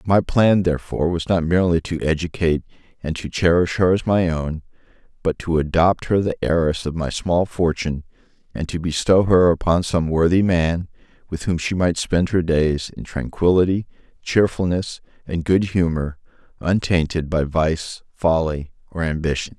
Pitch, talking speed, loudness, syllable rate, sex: 85 Hz, 160 wpm, -20 LUFS, 4.9 syllables/s, male